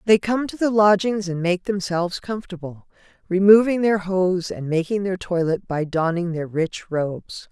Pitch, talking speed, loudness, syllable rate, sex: 185 Hz, 170 wpm, -21 LUFS, 4.7 syllables/s, female